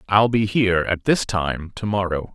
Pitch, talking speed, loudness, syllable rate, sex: 95 Hz, 205 wpm, -21 LUFS, 4.7 syllables/s, male